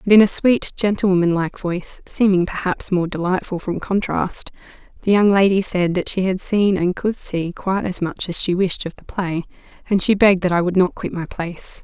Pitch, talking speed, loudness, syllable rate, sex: 185 Hz, 215 wpm, -19 LUFS, 5.3 syllables/s, female